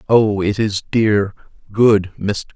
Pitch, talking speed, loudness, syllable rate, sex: 105 Hz, 95 wpm, -17 LUFS, 3.2 syllables/s, male